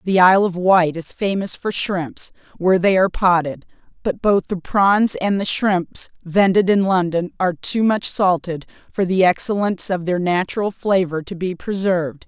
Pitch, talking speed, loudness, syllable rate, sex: 185 Hz, 175 wpm, -18 LUFS, 4.8 syllables/s, female